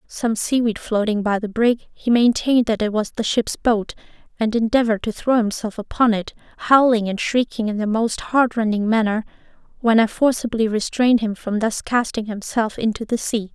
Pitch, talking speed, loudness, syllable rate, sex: 225 Hz, 180 wpm, -20 LUFS, 5.2 syllables/s, female